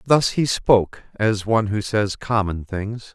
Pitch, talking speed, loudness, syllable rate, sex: 105 Hz, 170 wpm, -21 LUFS, 4.2 syllables/s, male